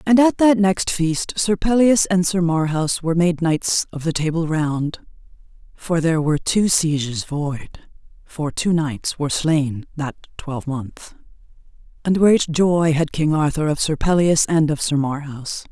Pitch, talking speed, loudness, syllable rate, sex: 160 Hz, 165 wpm, -19 LUFS, 4.3 syllables/s, female